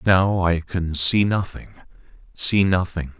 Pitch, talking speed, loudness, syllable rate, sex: 90 Hz, 115 wpm, -20 LUFS, 3.8 syllables/s, male